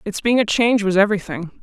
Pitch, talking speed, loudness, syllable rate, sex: 205 Hz, 220 wpm, -17 LUFS, 6.5 syllables/s, female